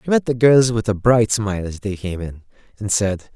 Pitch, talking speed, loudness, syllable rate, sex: 110 Hz, 250 wpm, -18 LUFS, 5.2 syllables/s, male